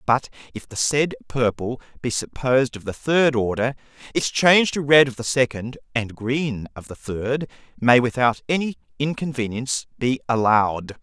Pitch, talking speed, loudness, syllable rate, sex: 125 Hz, 160 wpm, -21 LUFS, 4.7 syllables/s, male